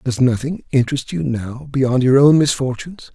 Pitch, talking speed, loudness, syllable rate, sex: 135 Hz, 170 wpm, -17 LUFS, 5.1 syllables/s, male